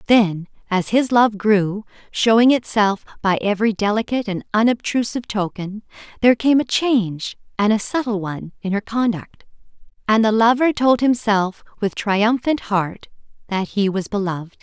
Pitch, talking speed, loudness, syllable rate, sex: 215 Hz, 150 wpm, -19 LUFS, 4.9 syllables/s, female